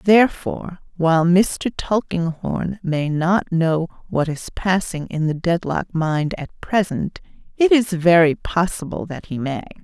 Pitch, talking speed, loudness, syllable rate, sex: 170 Hz, 140 wpm, -20 LUFS, 4.0 syllables/s, female